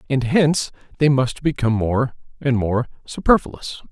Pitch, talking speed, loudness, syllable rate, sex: 130 Hz, 140 wpm, -20 LUFS, 4.7 syllables/s, male